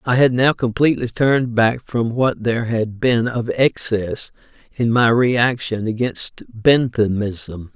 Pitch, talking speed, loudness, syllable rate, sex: 115 Hz, 140 wpm, -18 LUFS, 3.9 syllables/s, male